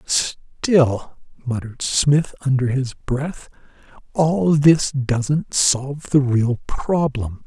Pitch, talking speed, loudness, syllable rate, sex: 135 Hz, 105 wpm, -19 LUFS, 2.9 syllables/s, male